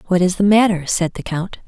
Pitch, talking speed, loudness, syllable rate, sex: 185 Hz, 250 wpm, -17 LUFS, 5.4 syllables/s, female